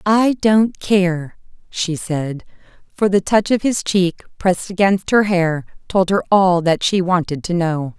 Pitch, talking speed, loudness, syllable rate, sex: 185 Hz, 175 wpm, -17 LUFS, 3.9 syllables/s, female